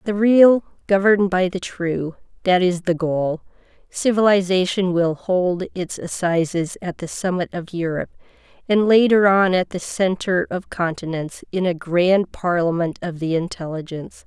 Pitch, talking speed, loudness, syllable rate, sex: 180 Hz, 145 wpm, -20 LUFS, 4.6 syllables/s, female